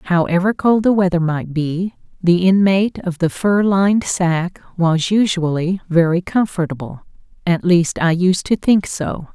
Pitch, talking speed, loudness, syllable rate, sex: 180 Hz, 150 wpm, -17 LUFS, 4.3 syllables/s, female